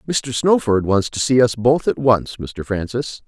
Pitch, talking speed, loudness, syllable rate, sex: 120 Hz, 200 wpm, -18 LUFS, 4.3 syllables/s, male